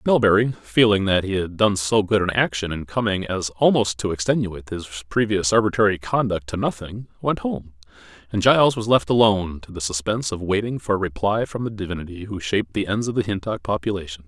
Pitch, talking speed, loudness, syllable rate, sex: 100 Hz, 200 wpm, -21 LUFS, 5.9 syllables/s, male